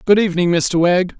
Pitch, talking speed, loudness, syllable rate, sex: 180 Hz, 200 wpm, -15 LUFS, 5.6 syllables/s, male